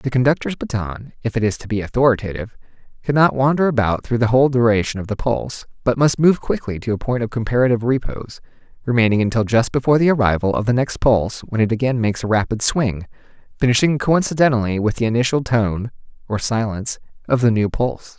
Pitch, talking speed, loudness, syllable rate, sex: 120 Hz, 190 wpm, -18 LUFS, 6.3 syllables/s, male